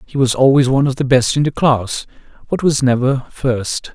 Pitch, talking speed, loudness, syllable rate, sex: 130 Hz, 215 wpm, -15 LUFS, 5.1 syllables/s, male